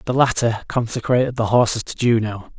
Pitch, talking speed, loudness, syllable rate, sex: 115 Hz, 160 wpm, -19 LUFS, 5.4 syllables/s, male